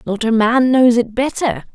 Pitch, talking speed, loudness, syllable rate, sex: 235 Hz, 205 wpm, -15 LUFS, 4.5 syllables/s, female